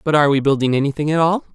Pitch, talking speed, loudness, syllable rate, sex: 150 Hz, 270 wpm, -17 LUFS, 8.0 syllables/s, male